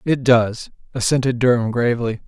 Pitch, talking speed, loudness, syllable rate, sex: 120 Hz, 130 wpm, -18 LUFS, 5.3 syllables/s, male